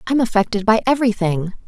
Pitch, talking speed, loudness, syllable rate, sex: 215 Hz, 145 wpm, -18 LUFS, 6.8 syllables/s, female